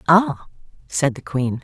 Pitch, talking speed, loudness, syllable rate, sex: 150 Hz, 145 wpm, -21 LUFS, 3.7 syllables/s, female